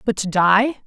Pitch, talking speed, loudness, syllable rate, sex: 210 Hz, 210 wpm, -17 LUFS, 4.0 syllables/s, female